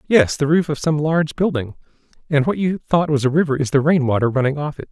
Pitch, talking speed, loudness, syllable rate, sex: 150 Hz, 255 wpm, -18 LUFS, 6.1 syllables/s, male